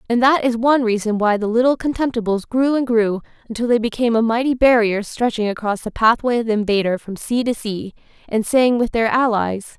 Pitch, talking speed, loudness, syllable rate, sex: 230 Hz, 210 wpm, -18 LUFS, 5.7 syllables/s, female